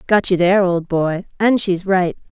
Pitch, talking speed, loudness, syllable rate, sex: 185 Hz, 200 wpm, -17 LUFS, 4.6 syllables/s, female